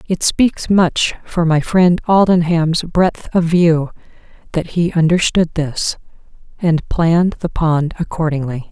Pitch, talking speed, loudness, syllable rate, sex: 165 Hz, 130 wpm, -15 LUFS, 3.8 syllables/s, female